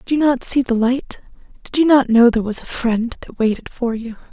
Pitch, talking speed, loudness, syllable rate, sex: 245 Hz, 250 wpm, -17 LUFS, 5.5 syllables/s, female